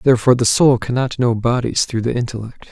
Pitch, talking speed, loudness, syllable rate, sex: 120 Hz, 200 wpm, -16 LUFS, 6.2 syllables/s, male